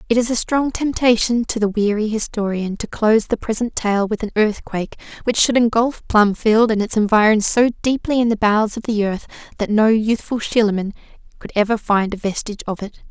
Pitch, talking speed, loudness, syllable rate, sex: 220 Hz, 195 wpm, -18 LUFS, 5.4 syllables/s, female